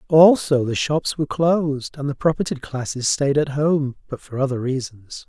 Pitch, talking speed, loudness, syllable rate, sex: 140 Hz, 170 wpm, -20 LUFS, 4.8 syllables/s, male